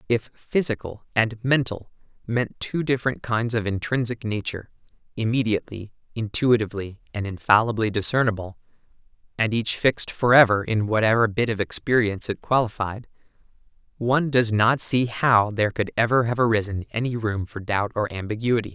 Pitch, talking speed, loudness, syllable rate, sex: 110 Hz, 140 wpm, -23 LUFS, 5.5 syllables/s, male